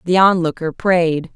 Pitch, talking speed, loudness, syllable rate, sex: 170 Hz, 135 wpm, -16 LUFS, 4.2 syllables/s, female